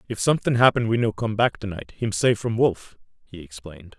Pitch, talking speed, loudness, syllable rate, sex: 110 Hz, 225 wpm, -22 LUFS, 6.1 syllables/s, male